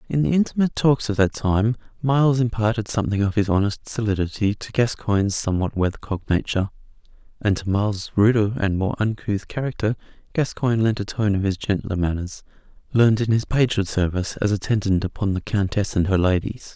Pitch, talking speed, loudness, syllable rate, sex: 105 Hz, 170 wpm, -22 LUFS, 6.0 syllables/s, male